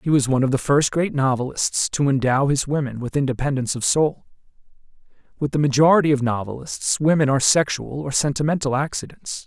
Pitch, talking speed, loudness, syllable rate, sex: 140 Hz, 170 wpm, -20 LUFS, 5.9 syllables/s, male